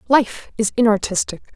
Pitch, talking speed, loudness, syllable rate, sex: 225 Hz, 115 wpm, -19 LUFS, 4.7 syllables/s, female